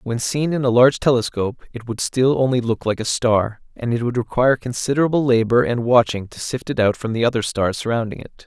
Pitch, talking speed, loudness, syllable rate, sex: 120 Hz, 225 wpm, -19 LUFS, 5.9 syllables/s, male